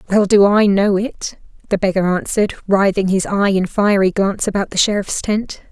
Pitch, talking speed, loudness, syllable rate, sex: 200 Hz, 190 wpm, -16 LUFS, 5.2 syllables/s, female